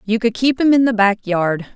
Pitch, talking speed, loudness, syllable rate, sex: 220 Hz, 275 wpm, -16 LUFS, 5.0 syllables/s, female